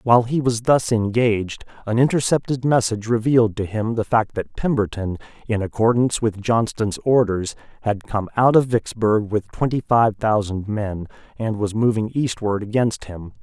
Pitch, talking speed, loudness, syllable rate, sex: 110 Hz, 160 wpm, -20 LUFS, 4.9 syllables/s, male